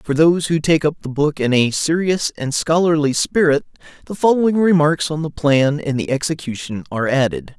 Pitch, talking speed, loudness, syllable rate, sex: 155 Hz, 190 wpm, -17 LUFS, 5.3 syllables/s, male